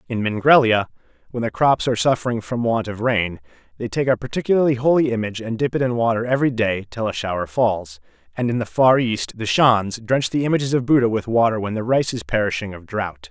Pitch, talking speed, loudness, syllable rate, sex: 115 Hz, 220 wpm, -20 LUFS, 5.9 syllables/s, male